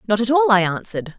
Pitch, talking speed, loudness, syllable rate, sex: 225 Hz, 255 wpm, -17 LUFS, 6.9 syllables/s, female